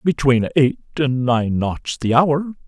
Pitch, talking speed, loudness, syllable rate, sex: 135 Hz, 155 wpm, -18 LUFS, 3.7 syllables/s, male